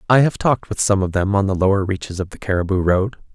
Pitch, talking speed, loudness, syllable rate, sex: 100 Hz, 270 wpm, -19 LUFS, 6.6 syllables/s, male